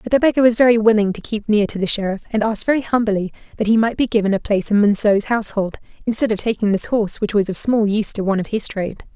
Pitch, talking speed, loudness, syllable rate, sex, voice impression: 215 Hz, 270 wpm, -18 LUFS, 7.0 syllables/s, female, feminine, adult-like, slightly fluent, slightly sincere, calm, slightly sweet